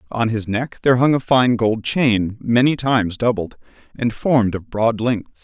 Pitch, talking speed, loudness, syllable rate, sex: 115 Hz, 190 wpm, -18 LUFS, 4.6 syllables/s, male